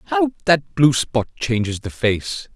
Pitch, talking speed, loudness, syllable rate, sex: 120 Hz, 165 wpm, -19 LUFS, 3.4 syllables/s, male